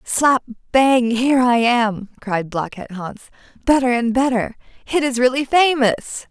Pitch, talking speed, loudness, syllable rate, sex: 245 Hz, 135 wpm, -17 LUFS, 4.2 syllables/s, female